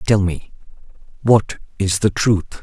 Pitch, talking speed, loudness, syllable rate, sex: 100 Hz, 135 wpm, -18 LUFS, 3.8 syllables/s, male